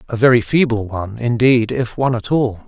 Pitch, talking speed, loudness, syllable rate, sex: 120 Hz, 200 wpm, -16 LUFS, 5.6 syllables/s, male